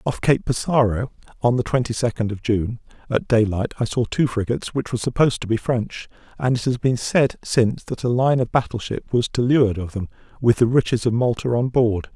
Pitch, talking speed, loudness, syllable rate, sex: 120 Hz, 225 wpm, -21 LUFS, 5.7 syllables/s, male